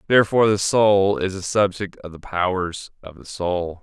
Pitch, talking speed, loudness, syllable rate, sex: 95 Hz, 190 wpm, -20 LUFS, 4.8 syllables/s, male